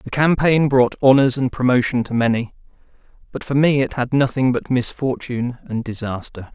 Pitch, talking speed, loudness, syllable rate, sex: 125 Hz, 165 wpm, -18 LUFS, 5.2 syllables/s, male